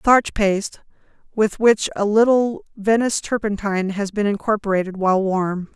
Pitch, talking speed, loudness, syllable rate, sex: 205 Hz, 135 wpm, -19 LUFS, 5.0 syllables/s, female